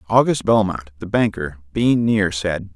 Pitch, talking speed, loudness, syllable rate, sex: 95 Hz, 150 wpm, -19 LUFS, 4.3 syllables/s, male